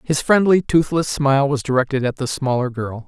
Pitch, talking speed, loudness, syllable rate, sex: 140 Hz, 195 wpm, -18 LUFS, 5.4 syllables/s, male